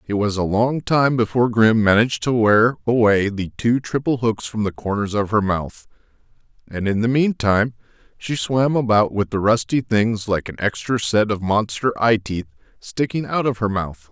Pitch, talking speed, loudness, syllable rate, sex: 110 Hz, 190 wpm, -19 LUFS, 4.9 syllables/s, male